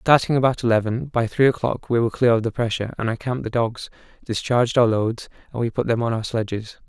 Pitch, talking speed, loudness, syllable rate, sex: 120 Hz, 235 wpm, -21 LUFS, 6.3 syllables/s, male